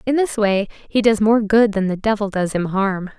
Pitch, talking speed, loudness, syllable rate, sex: 210 Hz, 245 wpm, -18 LUFS, 4.8 syllables/s, female